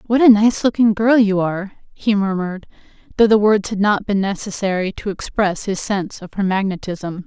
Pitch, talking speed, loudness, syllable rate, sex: 200 Hz, 190 wpm, -18 LUFS, 5.3 syllables/s, female